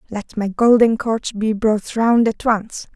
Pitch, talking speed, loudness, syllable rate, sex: 220 Hz, 185 wpm, -17 LUFS, 3.7 syllables/s, female